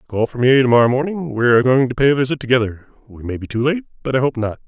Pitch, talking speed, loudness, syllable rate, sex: 125 Hz, 295 wpm, -17 LUFS, 7.2 syllables/s, male